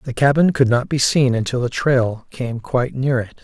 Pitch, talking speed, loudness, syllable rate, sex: 125 Hz, 225 wpm, -18 LUFS, 4.9 syllables/s, male